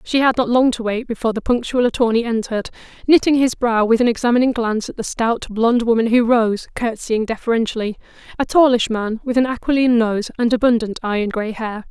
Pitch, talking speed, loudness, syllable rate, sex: 230 Hz, 190 wpm, -18 LUFS, 5.9 syllables/s, female